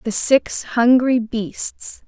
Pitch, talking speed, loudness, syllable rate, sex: 240 Hz, 115 wpm, -18 LUFS, 2.6 syllables/s, female